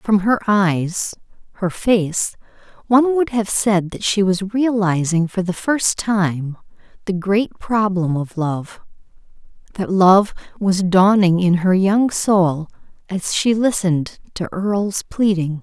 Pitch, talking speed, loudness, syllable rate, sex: 195 Hz, 140 wpm, -18 LUFS, 3.7 syllables/s, female